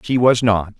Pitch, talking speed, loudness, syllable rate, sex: 110 Hz, 225 wpm, -16 LUFS, 4.6 syllables/s, male